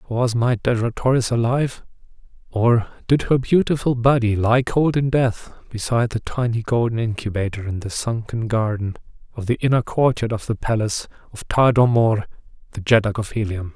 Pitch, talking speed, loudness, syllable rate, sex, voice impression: 115 Hz, 160 wpm, -20 LUFS, 5.3 syllables/s, male, masculine, middle-aged, relaxed, slightly muffled, slightly raspy, slightly sincere, calm, friendly, reassuring, wild, kind, modest